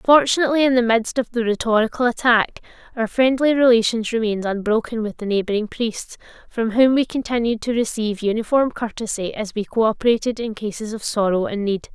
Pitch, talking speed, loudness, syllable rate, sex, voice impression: 225 Hz, 170 wpm, -20 LUFS, 5.7 syllables/s, female, feminine, adult-like, slightly tensed, slightly bright, clear, intellectual, calm, friendly, reassuring, lively, slightly kind